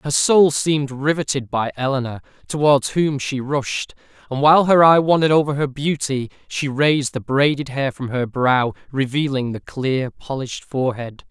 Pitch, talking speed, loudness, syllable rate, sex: 135 Hz, 165 wpm, -19 LUFS, 4.9 syllables/s, male